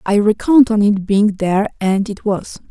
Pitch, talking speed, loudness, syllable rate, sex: 205 Hz, 200 wpm, -15 LUFS, 5.0 syllables/s, female